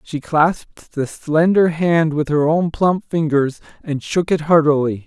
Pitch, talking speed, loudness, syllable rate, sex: 155 Hz, 165 wpm, -17 LUFS, 4.0 syllables/s, male